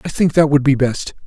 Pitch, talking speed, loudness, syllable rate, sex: 145 Hz, 285 wpm, -15 LUFS, 5.6 syllables/s, male